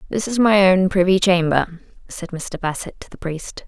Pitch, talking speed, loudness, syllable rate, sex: 180 Hz, 195 wpm, -18 LUFS, 4.7 syllables/s, female